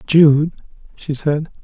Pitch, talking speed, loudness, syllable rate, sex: 150 Hz, 110 wpm, -16 LUFS, 3.1 syllables/s, male